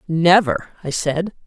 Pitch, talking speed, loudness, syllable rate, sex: 170 Hz, 125 wpm, -18 LUFS, 4.3 syllables/s, female